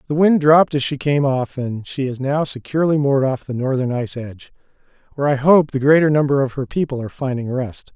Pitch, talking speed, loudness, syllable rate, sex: 135 Hz, 225 wpm, -18 LUFS, 6.2 syllables/s, male